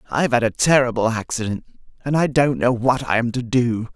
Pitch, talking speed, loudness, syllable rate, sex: 120 Hz, 210 wpm, -19 LUFS, 5.5 syllables/s, male